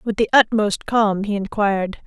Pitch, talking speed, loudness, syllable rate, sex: 215 Hz, 175 wpm, -19 LUFS, 4.6 syllables/s, female